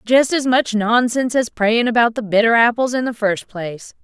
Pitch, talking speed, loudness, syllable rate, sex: 230 Hz, 210 wpm, -17 LUFS, 5.2 syllables/s, female